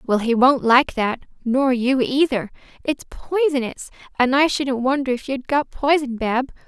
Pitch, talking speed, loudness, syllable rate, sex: 260 Hz, 170 wpm, -20 LUFS, 4.4 syllables/s, female